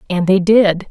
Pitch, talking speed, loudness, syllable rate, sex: 190 Hz, 200 wpm, -13 LUFS, 4.4 syllables/s, female